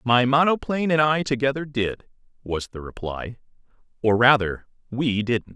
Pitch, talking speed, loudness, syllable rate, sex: 125 Hz, 140 wpm, -22 LUFS, 4.7 syllables/s, male